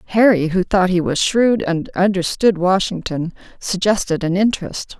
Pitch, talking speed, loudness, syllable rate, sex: 190 Hz, 145 wpm, -17 LUFS, 4.8 syllables/s, female